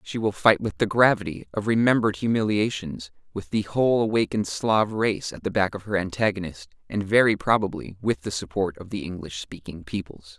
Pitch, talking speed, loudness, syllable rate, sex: 100 Hz, 185 wpm, -24 LUFS, 5.5 syllables/s, male